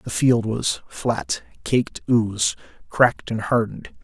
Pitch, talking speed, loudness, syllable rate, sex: 115 Hz, 135 wpm, -22 LUFS, 4.3 syllables/s, male